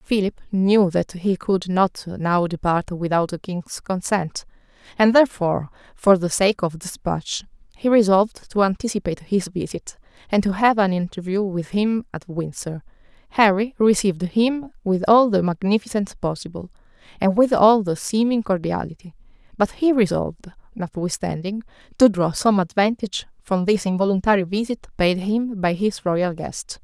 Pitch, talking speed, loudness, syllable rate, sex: 195 Hz, 150 wpm, -21 LUFS, 4.8 syllables/s, female